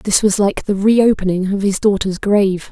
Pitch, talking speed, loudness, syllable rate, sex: 200 Hz, 200 wpm, -15 LUFS, 4.9 syllables/s, female